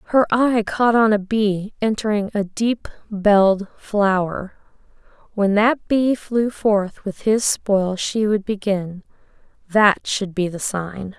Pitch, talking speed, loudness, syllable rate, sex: 205 Hz, 140 wpm, -19 LUFS, 3.5 syllables/s, female